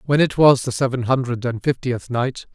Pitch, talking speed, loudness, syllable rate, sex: 125 Hz, 215 wpm, -19 LUFS, 5.1 syllables/s, male